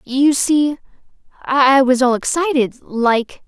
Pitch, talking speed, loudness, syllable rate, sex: 265 Hz, 120 wpm, -15 LUFS, 3.8 syllables/s, female